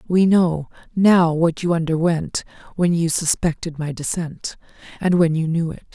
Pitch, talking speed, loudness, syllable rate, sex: 165 Hz, 160 wpm, -20 LUFS, 4.4 syllables/s, female